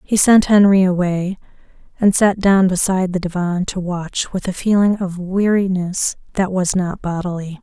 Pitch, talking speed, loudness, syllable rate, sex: 185 Hz, 165 wpm, -17 LUFS, 4.6 syllables/s, female